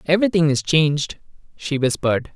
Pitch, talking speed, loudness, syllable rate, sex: 155 Hz, 130 wpm, -19 LUFS, 5.9 syllables/s, male